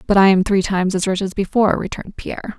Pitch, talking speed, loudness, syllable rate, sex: 195 Hz, 255 wpm, -18 LUFS, 7.0 syllables/s, female